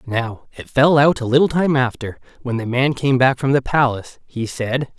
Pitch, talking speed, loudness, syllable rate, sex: 130 Hz, 215 wpm, -18 LUFS, 4.9 syllables/s, male